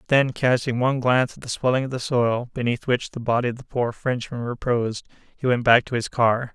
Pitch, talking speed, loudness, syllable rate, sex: 125 Hz, 230 wpm, -22 LUFS, 5.6 syllables/s, male